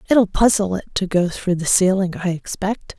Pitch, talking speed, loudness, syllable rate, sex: 190 Hz, 200 wpm, -19 LUFS, 4.9 syllables/s, female